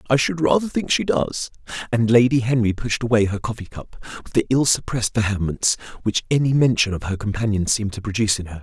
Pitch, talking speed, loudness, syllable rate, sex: 115 Hz, 210 wpm, -20 LUFS, 6.3 syllables/s, male